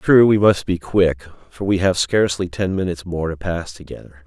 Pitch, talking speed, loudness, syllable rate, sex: 90 Hz, 210 wpm, -18 LUFS, 5.2 syllables/s, male